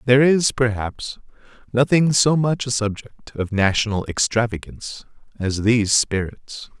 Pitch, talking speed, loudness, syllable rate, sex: 115 Hz, 125 wpm, -19 LUFS, 4.5 syllables/s, male